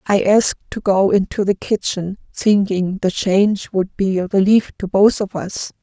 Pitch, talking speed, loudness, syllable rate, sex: 195 Hz, 185 wpm, -17 LUFS, 4.5 syllables/s, female